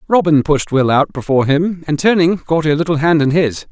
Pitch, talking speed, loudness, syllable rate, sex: 155 Hz, 225 wpm, -14 LUFS, 5.4 syllables/s, male